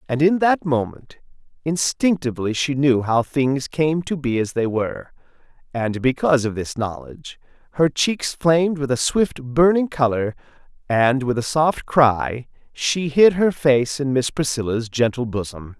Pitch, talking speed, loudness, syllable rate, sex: 135 Hz, 155 wpm, -20 LUFS, 4.4 syllables/s, male